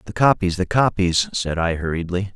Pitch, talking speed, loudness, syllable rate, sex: 90 Hz, 180 wpm, -20 LUFS, 5.1 syllables/s, male